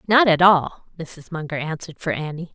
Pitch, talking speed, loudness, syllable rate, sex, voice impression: 165 Hz, 190 wpm, -20 LUFS, 5.4 syllables/s, female, feminine, middle-aged, slightly relaxed, slightly bright, soft, fluent, friendly, reassuring, elegant, kind, slightly modest